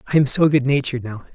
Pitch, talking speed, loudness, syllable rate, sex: 135 Hz, 225 wpm, -18 LUFS, 6.9 syllables/s, male